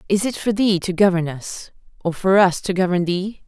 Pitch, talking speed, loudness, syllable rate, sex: 185 Hz, 225 wpm, -19 LUFS, 5.1 syllables/s, female